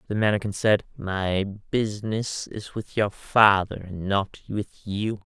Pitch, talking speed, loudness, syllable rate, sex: 100 Hz, 145 wpm, -25 LUFS, 4.0 syllables/s, male